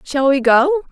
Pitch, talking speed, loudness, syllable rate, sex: 295 Hz, 195 wpm, -14 LUFS, 4.8 syllables/s, female